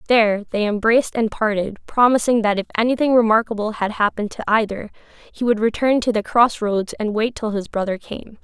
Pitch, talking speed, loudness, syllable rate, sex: 220 Hz, 190 wpm, -19 LUFS, 5.6 syllables/s, female